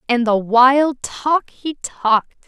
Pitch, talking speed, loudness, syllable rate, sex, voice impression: 255 Hz, 145 wpm, -17 LUFS, 3.4 syllables/s, female, feminine, slightly adult-like, slightly cute, slightly intellectual, friendly, slightly sweet